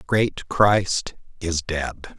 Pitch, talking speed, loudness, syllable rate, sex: 90 Hz, 110 wpm, -22 LUFS, 2.6 syllables/s, male